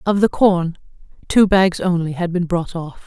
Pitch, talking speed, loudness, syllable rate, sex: 180 Hz, 195 wpm, -17 LUFS, 4.5 syllables/s, female